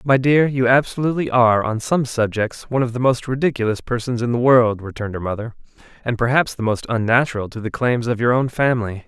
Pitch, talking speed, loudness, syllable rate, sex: 120 Hz, 210 wpm, -19 LUFS, 6.2 syllables/s, male